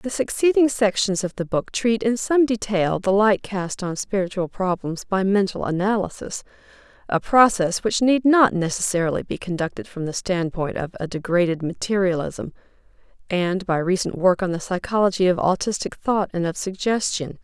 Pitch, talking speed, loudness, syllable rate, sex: 195 Hz, 155 wpm, -21 LUFS, 5.0 syllables/s, female